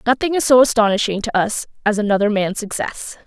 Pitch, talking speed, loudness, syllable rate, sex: 220 Hz, 185 wpm, -17 LUFS, 5.9 syllables/s, female